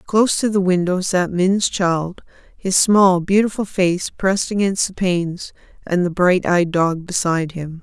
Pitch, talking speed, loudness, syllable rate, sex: 185 Hz, 170 wpm, -18 LUFS, 4.4 syllables/s, female